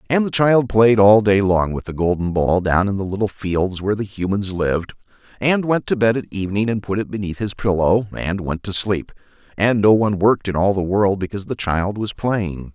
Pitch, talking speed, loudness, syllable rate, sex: 100 Hz, 230 wpm, -19 LUFS, 5.4 syllables/s, male